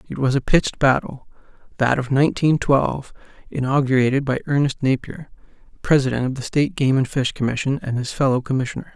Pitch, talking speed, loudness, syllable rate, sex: 135 Hz, 160 wpm, -20 LUFS, 6.2 syllables/s, male